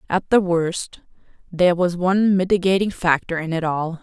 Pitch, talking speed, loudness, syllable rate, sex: 175 Hz, 165 wpm, -19 LUFS, 5.1 syllables/s, female